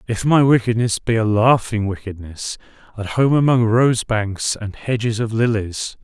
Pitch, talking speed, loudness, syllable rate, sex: 115 Hz, 160 wpm, -18 LUFS, 4.4 syllables/s, male